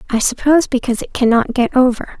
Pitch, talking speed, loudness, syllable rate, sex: 250 Hz, 190 wpm, -15 LUFS, 6.5 syllables/s, female